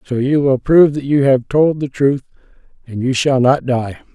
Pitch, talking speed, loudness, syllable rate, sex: 135 Hz, 215 wpm, -15 LUFS, 4.9 syllables/s, male